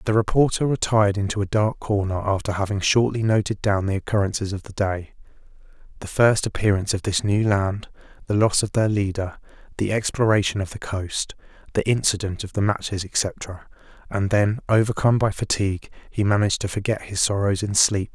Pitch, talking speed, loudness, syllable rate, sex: 100 Hz, 175 wpm, -22 LUFS, 5.6 syllables/s, male